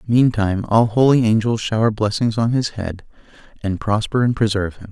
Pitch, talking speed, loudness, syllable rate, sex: 110 Hz, 170 wpm, -18 LUFS, 5.5 syllables/s, male